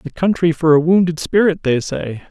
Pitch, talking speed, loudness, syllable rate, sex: 165 Hz, 210 wpm, -16 LUFS, 5.1 syllables/s, male